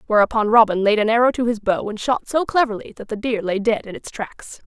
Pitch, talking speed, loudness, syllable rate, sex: 220 Hz, 255 wpm, -19 LUFS, 5.9 syllables/s, female